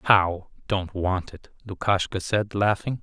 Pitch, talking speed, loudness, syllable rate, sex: 100 Hz, 120 wpm, -25 LUFS, 3.8 syllables/s, male